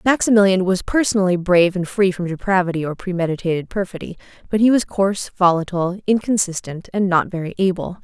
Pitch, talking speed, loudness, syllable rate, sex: 185 Hz, 155 wpm, -18 LUFS, 6.1 syllables/s, female